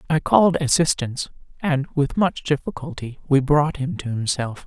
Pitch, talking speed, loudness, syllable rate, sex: 150 Hz, 155 wpm, -21 LUFS, 4.9 syllables/s, female